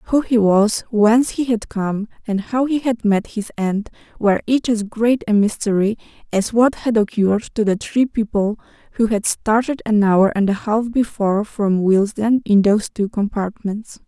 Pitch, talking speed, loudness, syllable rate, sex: 215 Hz, 185 wpm, -18 LUFS, 4.7 syllables/s, female